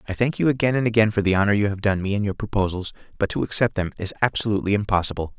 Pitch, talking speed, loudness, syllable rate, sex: 105 Hz, 255 wpm, -22 LUFS, 7.4 syllables/s, male